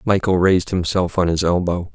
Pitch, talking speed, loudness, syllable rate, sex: 90 Hz, 185 wpm, -18 LUFS, 5.5 syllables/s, male